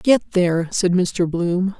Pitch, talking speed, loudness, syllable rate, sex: 185 Hz, 165 wpm, -19 LUFS, 3.9 syllables/s, female